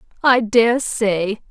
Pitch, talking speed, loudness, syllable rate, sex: 225 Hz, 120 wpm, -17 LUFS, 3.0 syllables/s, female